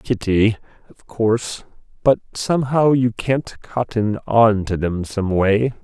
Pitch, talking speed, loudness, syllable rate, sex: 110 Hz, 125 wpm, -19 LUFS, 4.0 syllables/s, male